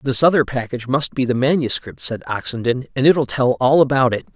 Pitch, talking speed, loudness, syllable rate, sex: 130 Hz, 205 wpm, -18 LUFS, 5.7 syllables/s, male